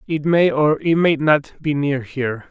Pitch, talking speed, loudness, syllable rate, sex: 145 Hz, 215 wpm, -18 LUFS, 4.4 syllables/s, male